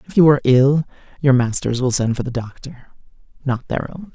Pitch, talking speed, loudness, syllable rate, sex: 135 Hz, 190 wpm, -18 LUFS, 5.5 syllables/s, male